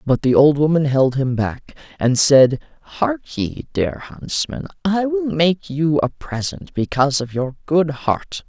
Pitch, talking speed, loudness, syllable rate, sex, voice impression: 135 Hz, 170 wpm, -18 LUFS, 3.9 syllables/s, male, masculine, adult-like, tensed, powerful, slightly bright, clear, nasal, intellectual, friendly, unique, slightly wild, lively